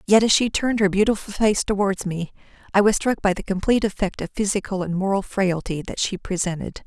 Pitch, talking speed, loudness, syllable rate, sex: 195 Hz, 210 wpm, -22 LUFS, 6.0 syllables/s, female